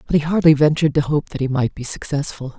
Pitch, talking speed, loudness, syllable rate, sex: 145 Hz, 255 wpm, -18 LUFS, 6.5 syllables/s, female